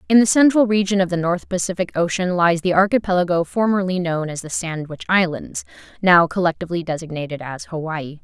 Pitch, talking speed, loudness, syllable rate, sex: 180 Hz, 165 wpm, -19 LUFS, 5.8 syllables/s, female